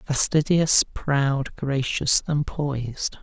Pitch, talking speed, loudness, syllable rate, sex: 140 Hz, 95 wpm, -22 LUFS, 3.1 syllables/s, male